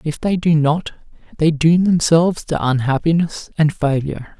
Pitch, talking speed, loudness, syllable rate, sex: 160 Hz, 150 wpm, -17 LUFS, 4.8 syllables/s, male